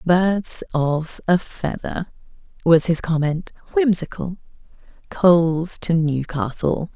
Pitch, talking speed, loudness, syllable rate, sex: 170 Hz, 95 wpm, -20 LUFS, 3.5 syllables/s, female